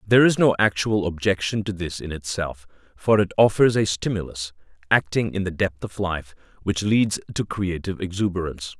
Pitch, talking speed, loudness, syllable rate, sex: 95 Hz, 170 wpm, -23 LUFS, 5.3 syllables/s, male